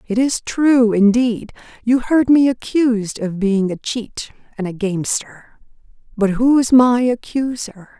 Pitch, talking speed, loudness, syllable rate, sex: 230 Hz, 150 wpm, -17 LUFS, 4.0 syllables/s, female